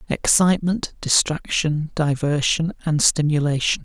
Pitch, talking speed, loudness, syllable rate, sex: 155 Hz, 80 wpm, -20 LUFS, 4.3 syllables/s, male